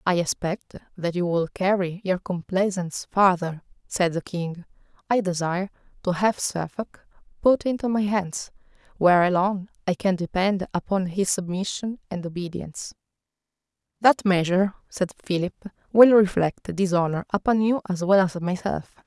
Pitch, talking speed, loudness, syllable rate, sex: 185 Hz, 140 wpm, -24 LUFS, 4.9 syllables/s, female